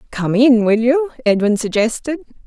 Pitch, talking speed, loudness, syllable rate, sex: 240 Hz, 145 wpm, -16 LUFS, 4.9 syllables/s, female